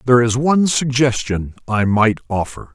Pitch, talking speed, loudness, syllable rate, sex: 120 Hz, 155 wpm, -17 LUFS, 5.0 syllables/s, male